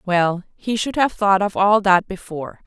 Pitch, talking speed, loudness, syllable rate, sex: 195 Hz, 205 wpm, -18 LUFS, 4.6 syllables/s, female